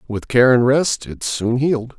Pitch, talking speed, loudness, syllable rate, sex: 125 Hz, 210 wpm, -17 LUFS, 4.4 syllables/s, male